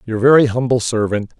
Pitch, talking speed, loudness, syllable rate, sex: 120 Hz, 175 wpm, -15 LUFS, 5.9 syllables/s, male